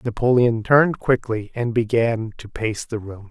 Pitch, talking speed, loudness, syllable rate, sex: 115 Hz, 165 wpm, -20 LUFS, 4.5 syllables/s, male